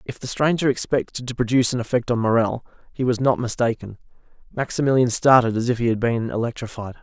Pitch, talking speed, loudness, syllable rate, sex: 120 Hz, 180 wpm, -21 LUFS, 6.2 syllables/s, male